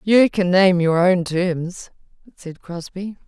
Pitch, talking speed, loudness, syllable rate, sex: 185 Hz, 145 wpm, -17 LUFS, 3.4 syllables/s, female